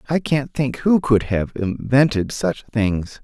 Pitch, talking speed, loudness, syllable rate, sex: 125 Hz, 165 wpm, -20 LUFS, 3.7 syllables/s, male